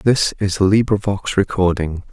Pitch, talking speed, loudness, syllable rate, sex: 100 Hz, 140 wpm, -17 LUFS, 4.6 syllables/s, male